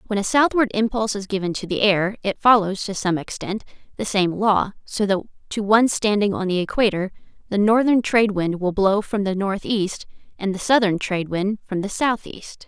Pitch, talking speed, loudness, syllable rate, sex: 205 Hz, 200 wpm, -21 LUFS, 5.3 syllables/s, female